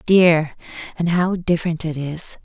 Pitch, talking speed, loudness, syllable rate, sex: 165 Hz, 150 wpm, -19 LUFS, 4.2 syllables/s, female